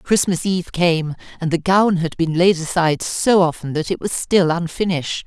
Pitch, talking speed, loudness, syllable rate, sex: 170 Hz, 195 wpm, -18 LUFS, 5.0 syllables/s, female